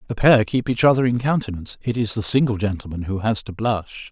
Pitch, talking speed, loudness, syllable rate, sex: 110 Hz, 235 wpm, -20 LUFS, 5.9 syllables/s, male